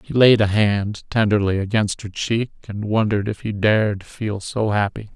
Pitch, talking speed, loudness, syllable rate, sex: 105 Hz, 185 wpm, -20 LUFS, 4.8 syllables/s, male